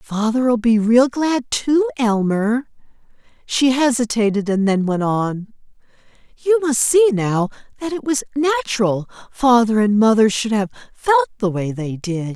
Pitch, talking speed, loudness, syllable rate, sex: 235 Hz, 145 wpm, -18 LUFS, 4.1 syllables/s, female